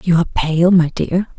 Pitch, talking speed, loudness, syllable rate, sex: 175 Hz, 215 wpm, -15 LUFS, 5.0 syllables/s, female